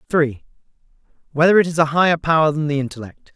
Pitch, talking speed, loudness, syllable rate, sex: 155 Hz, 180 wpm, -17 LUFS, 7.4 syllables/s, male